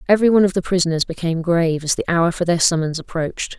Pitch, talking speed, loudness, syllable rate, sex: 170 Hz, 235 wpm, -18 LUFS, 7.4 syllables/s, female